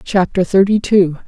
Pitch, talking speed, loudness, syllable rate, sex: 190 Hz, 140 wpm, -14 LUFS, 4.6 syllables/s, female